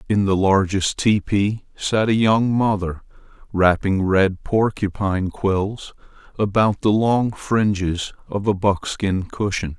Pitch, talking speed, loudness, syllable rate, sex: 100 Hz, 125 wpm, -20 LUFS, 3.7 syllables/s, male